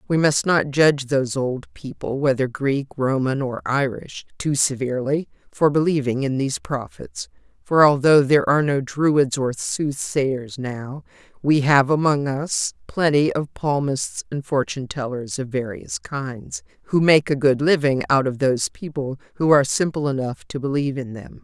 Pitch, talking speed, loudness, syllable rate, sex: 140 Hz, 160 wpm, -21 LUFS, 4.7 syllables/s, female